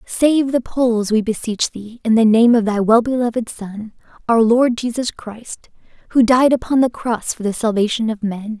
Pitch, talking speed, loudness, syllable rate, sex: 230 Hz, 195 wpm, -17 LUFS, 4.7 syllables/s, female